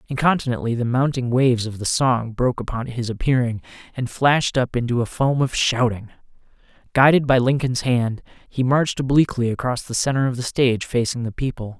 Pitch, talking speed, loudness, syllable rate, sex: 125 Hz, 180 wpm, -20 LUFS, 5.8 syllables/s, male